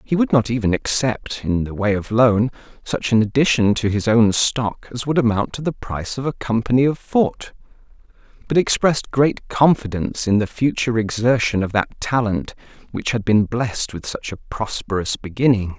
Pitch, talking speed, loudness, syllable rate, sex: 115 Hz, 180 wpm, -19 LUFS, 5.1 syllables/s, male